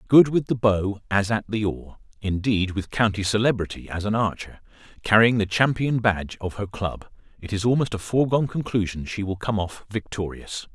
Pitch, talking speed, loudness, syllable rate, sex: 105 Hz, 165 wpm, -23 LUFS, 5.3 syllables/s, male